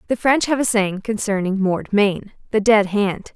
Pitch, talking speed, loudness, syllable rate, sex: 210 Hz, 180 wpm, -19 LUFS, 4.4 syllables/s, female